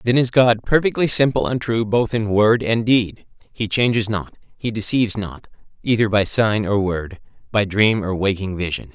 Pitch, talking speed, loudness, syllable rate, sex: 110 Hz, 190 wpm, -19 LUFS, 4.8 syllables/s, male